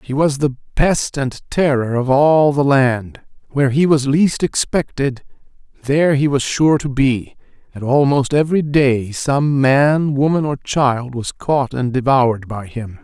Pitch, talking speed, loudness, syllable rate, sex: 135 Hz, 165 wpm, -16 LUFS, 4.1 syllables/s, male